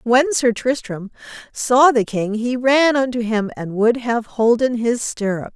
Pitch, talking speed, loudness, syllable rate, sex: 235 Hz, 185 wpm, -18 LUFS, 4.2 syllables/s, female